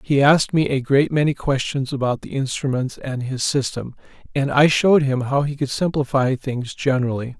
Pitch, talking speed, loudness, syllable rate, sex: 135 Hz, 185 wpm, -20 LUFS, 5.2 syllables/s, male